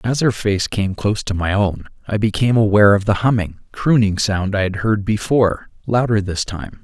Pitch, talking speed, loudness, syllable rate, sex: 105 Hz, 200 wpm, -17 LUFS, 5.3 syllables/s, male